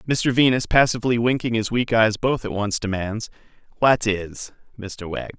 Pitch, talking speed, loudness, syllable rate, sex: 115 Hz, 165 wpm, -21 LUFS, 4.7 syllables/s, male